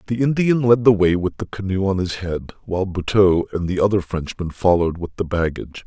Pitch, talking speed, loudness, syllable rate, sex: 95 Hz, 215 wpm, -19 LUFS, 5.8 syllables/s, male